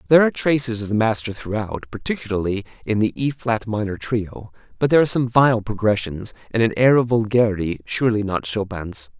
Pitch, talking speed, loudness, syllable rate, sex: 110 Hz, 185 wpm, -20 LUFS, 5.9 syllables/s, male